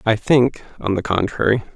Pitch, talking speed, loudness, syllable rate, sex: 110 Hz, 170 wpm, -19 LUFS, 5.0 syllables/s, male